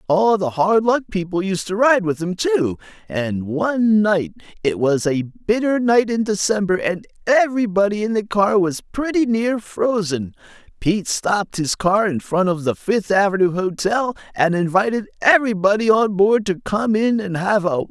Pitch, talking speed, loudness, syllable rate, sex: 200 Hz, 175 wpm, -19 LUFS, 4.9 syllables/s, male